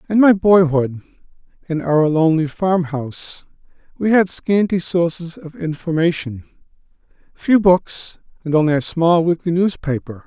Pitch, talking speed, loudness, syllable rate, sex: 165 Hz, 130 wpm, -17 LUFS, 4.5 syllables/s, male